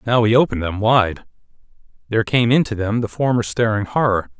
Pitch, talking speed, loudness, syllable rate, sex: 110 Hz, 175 wpm, -18 LUFS, 6.0 syllables/s, male